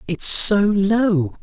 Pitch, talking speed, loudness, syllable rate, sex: 195 Hz, 125 wpm, -16 LUFS, 2.4 syllables/s, male